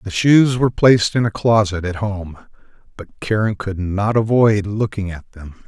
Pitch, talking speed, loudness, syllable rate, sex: 105 Hz, 180 wpm, -17 LUFS, 4.6 syllables/s, male